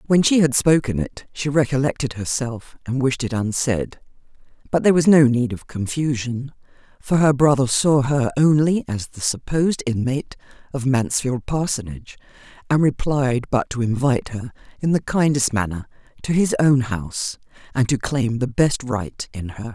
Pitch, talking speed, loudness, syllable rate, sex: 130 Hz, 165 wpm, -20 LUFS, 4.9 syllables/s, female